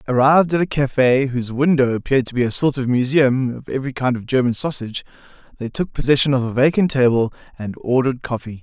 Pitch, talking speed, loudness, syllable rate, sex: 130 Hz, 200 wpm, -18 LUFS, 6.4 syllables/s, male